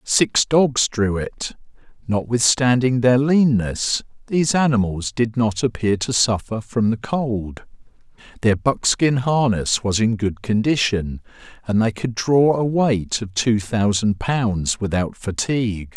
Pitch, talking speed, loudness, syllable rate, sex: 115 Hz, 135 wpm, -19 LUFS, 3.8 syllables/s, male